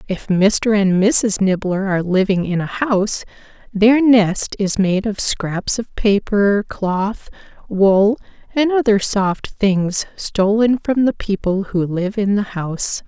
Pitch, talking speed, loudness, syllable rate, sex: 205 Hz, 150 wpm, -17 LUFS, 3.7 syllables/s, female